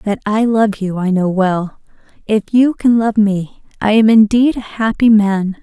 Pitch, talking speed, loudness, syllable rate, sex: 210 Hz, 190 wpm, -14 LUFS, 4.1 syllables/s, female